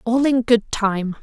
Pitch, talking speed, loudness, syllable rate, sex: 230 Hz, 195 wpm, -18 LUFS, 3.7 syllables/s, female